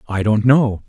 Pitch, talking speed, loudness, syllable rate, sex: 115 Hz, 205 wpm, -15 LUFS, 4.5 syllables/s, male